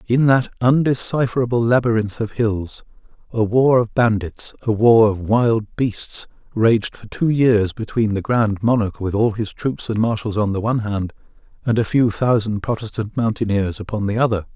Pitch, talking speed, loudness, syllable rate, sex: 110 Hz, 175 wpm, -19 LUFS, 4.7 syllables/s, male